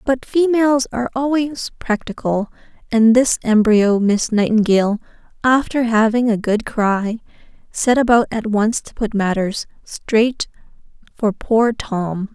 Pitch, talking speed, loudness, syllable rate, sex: 225 Hz, 125 wpm, -17 LUFS, 4.1 syllables/s, female